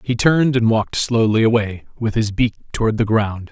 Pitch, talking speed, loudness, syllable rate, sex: 110 Hz, 205 wpm, -18 LUFS, 5.5 syllables/s, male